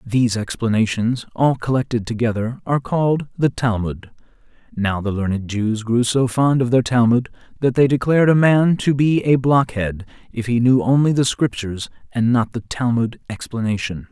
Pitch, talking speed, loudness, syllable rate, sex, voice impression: 120 Hz, 165 wpm, -19 LUFS, 5.0 syllables/s, male, masculine, very adult-like, slightly thick, slightly refreshing, sincere, slightly friendly